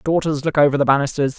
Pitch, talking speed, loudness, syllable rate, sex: 145 Hz, 215 wpm, -18 LUFS, 7.0 syllables/s, male